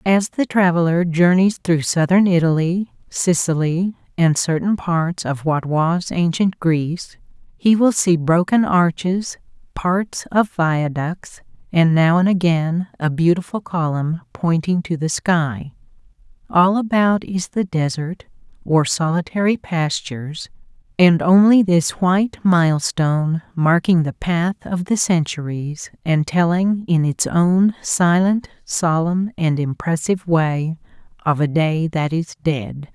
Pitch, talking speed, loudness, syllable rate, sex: 170 Hz, 125 wpm, -18 LUFS, 3.9 syllables/s, female